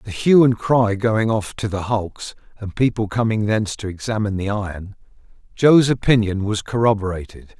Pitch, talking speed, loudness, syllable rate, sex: 110 Hz, 165 wpm, -19 LUFS, 5.1 syllables/s, male